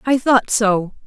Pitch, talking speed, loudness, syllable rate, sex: 225 Hz, 170 wpm, -16 LUFS, 3.5 syllables/s, female